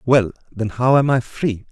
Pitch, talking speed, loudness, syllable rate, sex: 120 Hz, 210 wpm, -18 LUFS, 4.4 syllables/s, male